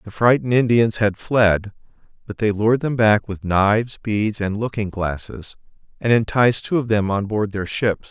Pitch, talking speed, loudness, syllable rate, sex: 105 Hz, 185 wpm, -19 LUFS, 4.9 syllables/s, male